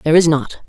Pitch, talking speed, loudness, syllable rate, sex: 150 Hz, 265 wpm, -15 LUFS, 7.1 syllables/s, female